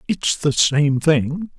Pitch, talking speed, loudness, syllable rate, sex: 150 Hz, 150 wpm, -18 LUFS, 3.0 syllables/s, male